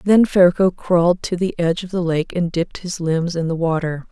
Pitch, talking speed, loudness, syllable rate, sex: 175 Hz, 235 wpm, -18 LUFS, 5.3 syllables/s, female